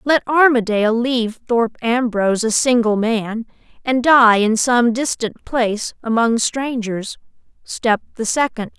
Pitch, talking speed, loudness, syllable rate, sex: 235 Hz, 125 wpm, -17 LUFS, 4.2 syllables/s, female